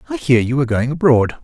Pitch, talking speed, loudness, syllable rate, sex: 140 Hz, 250 wpm, -16 LUFS, 6.8 syllables/s, male